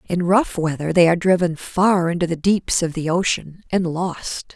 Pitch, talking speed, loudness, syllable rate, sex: 175 Hz, 200 wpm, -19 LUFS, 4.7 syllables/s, female